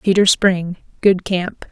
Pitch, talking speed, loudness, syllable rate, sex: 185 Hz, 105 wpm, -16 LUFS, 3.7 syllables/s, female